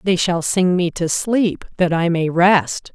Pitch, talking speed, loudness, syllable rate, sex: 175 Hz, 205 wpm, -17 LUFS, 3.7 syllables/s, female